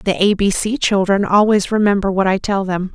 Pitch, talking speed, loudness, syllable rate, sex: 195 Hz, 225 wpm, -16 LUFS, 5.2 syllables/s, female